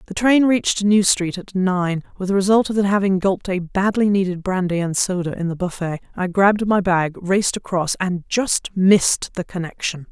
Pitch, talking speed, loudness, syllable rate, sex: 190 Hz, 190 wpm, -19 LUFS, 5.0 syllables/s, female